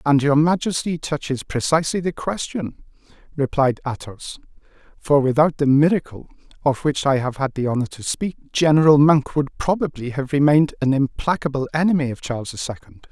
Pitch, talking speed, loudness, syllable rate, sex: 145 Hz, 160 wpm, -20 LUFS, 5.4 syllables/s, male